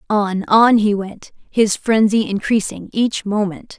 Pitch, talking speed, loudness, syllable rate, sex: 210 Hz, 125 wpm, -17 LUFS, 3.8 syllables/s, female